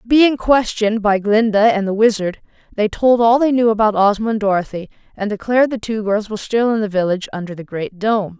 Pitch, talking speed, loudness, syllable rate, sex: 215 Hz, 215 wpm, -16 LUFS, 5.7 syllables/s, female